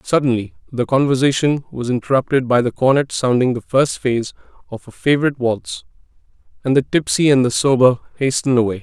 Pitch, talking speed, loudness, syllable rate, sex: 130 Hz, 165 wpm, -17 LUFS, 5.9 syllables/s, male